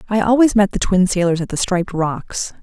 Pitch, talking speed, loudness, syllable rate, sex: 195 Hz, 230 wpm, -17 LUFS, 5.5 syllables/s, female